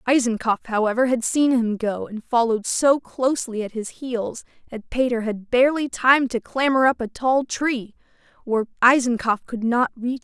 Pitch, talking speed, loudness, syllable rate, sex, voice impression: 240 Hz, 175 wpm, -21 LUFS, 5.0 syllables/s, female, very feminine, young, very thin, tensed, powerful, bright, soft, very clear, fluent, slightly raspy, cute, intellectual, very refreshing, sincere, slightly calm, friendly, slightly reassuring, unique, slightly elegant, wild, slightly sweet, very lively, strict, intense, slightly sharp, light